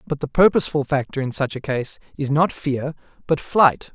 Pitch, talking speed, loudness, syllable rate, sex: 145 Hz, 200 wpm, -20 LUFS, 5.2 syllables/s, male